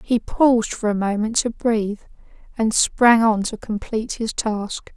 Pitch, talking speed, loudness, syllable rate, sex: 220 Hz, 170 wpm, -20 LUFS, 4.4 syllables/s, female